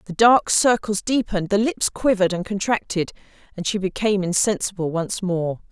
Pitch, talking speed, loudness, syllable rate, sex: 195 Hz, 160 wpm, -21 LUFS, 5.4 syllables/s, female